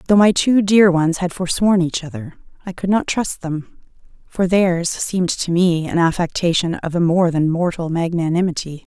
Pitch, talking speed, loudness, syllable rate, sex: 175 Hz, 180 wpm, -18 LUFS, 4.8 syllables/s, female